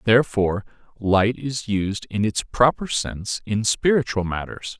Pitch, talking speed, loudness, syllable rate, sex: 110 Hz, 140 wpm, -22 LUFS, 4.5 syllables/s, male